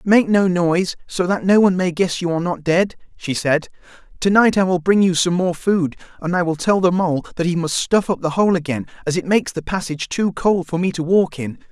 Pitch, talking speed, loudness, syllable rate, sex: 175 Hz, 255 wpm, -18 LUFS, 5.7 syllables/s, male